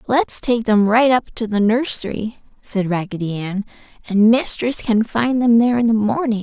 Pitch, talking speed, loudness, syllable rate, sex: 220 Hz, 185 wpm, -17 LUFS, 4.8 syllables/s, female